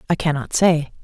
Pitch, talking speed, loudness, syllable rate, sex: 155 Hz, 175 wpm, -19 LUFS, 5.2 syllables/s, female